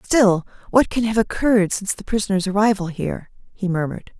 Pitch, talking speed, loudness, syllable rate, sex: 200 Hz, 170 wpm, -20 LUFS, 6.1 syllables/s, female